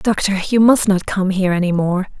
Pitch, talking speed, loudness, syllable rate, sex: 195 Hz, 220 wpm, -16 LUFS, 5.9 syllables/s, female